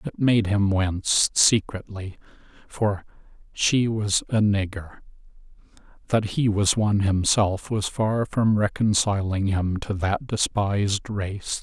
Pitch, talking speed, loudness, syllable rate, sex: 100 Hz, 120 wpm, -23 LUFS, 3.8 syllables/s, male